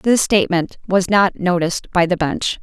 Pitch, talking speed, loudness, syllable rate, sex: 185 Hz, 185 wpm, -17 LUFS, 4.8 syllables/s, female